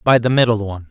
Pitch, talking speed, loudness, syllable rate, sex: 110 Hz, 265 wpm, -16 LUFS, 7.4 syllables/s, male